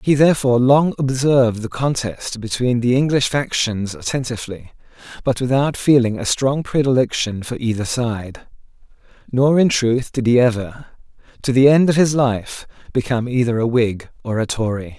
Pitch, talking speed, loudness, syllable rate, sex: 125 Hz, 155 wpm, -18 LUFS, 5.0 syllables/s, male